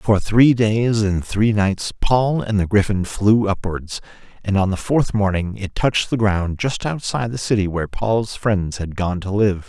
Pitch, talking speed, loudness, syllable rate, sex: 105 Hz, 200 wpm, -19 LUFS, 4.3 syllables/s, male